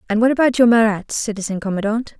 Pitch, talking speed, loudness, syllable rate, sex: 220 Hz, 190 wpm, -17 LUFS, 6.5 syllables/s, female